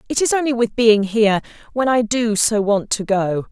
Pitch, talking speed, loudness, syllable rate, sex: 220 Hz, 220 wpm, -17 LUFS, 5.0 syllables/s, female